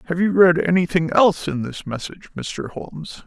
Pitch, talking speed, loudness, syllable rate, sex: 165 Hz, 185 wpm, -19 LUFS, 5.4 syllables/s, male